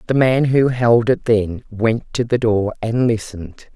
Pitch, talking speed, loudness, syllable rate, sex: 115 Hz, 190 wpm, -17 LUFS, 4.1 syllables/s, female